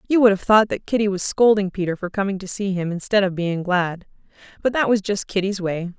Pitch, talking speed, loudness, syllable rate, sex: 195 Hz, 240 wpm, -20 LUFS, 5.7 syllables/s, female